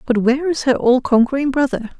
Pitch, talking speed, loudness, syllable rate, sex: 260 Hz, 210 wpm, -16 LUFS, 6.1 syllables/s, female